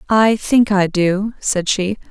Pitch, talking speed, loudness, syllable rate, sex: 200 Hz, 170 wpm, -16 LUFS, 3.4 syllables/s, female